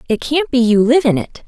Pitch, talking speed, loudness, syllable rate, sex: 255 Hz, 285 wpm, -14 LUFS, 5.4 syllables/s, female